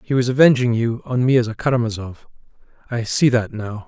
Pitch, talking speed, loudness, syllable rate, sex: 120 Hz, 200 wpm, -18 LUFS, 5.8 syllables/s, male